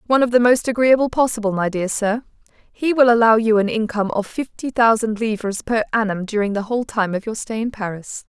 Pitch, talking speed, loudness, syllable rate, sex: 220 Hz, 215 wpm, -19 LUFS, 5.9 syllables/s, female